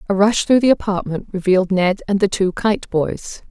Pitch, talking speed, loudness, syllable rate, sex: 195 Hz, 205 wpm, -17 LUFS, 5.0 syllables/s, female